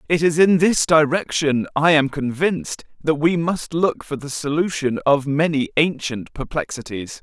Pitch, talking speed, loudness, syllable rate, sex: 150 Hz, 160 wpm, -19 LUFS, 4.5 syllables/s, male